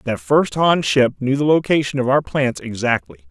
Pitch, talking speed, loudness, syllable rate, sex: 130 Hz, 200 wpm, -18 LUFS, 4.8 syllables/s, male